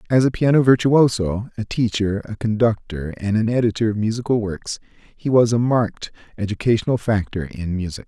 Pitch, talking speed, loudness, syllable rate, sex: 110 Hz, 165 wpm, -20 LUFS, 5.4 syllables/s, male